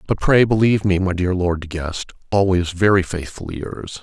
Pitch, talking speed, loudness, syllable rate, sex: 90 Hz, 195 wpm, -19 LUFS, 5.2 syllables/s, male